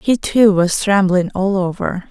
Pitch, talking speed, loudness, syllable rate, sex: 190 Hz, 170 wpm, -15 LUFS, 4.0 syllables/s, female